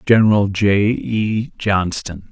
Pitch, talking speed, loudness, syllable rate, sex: 105 Hz, 105 wpm, -17 LUFS, 3.3 syllables/s, male